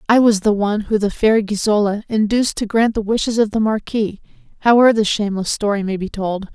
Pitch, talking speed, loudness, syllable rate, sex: 210 Hz, 210 wpm, -17 LUFS, 6.0 syllables/s, female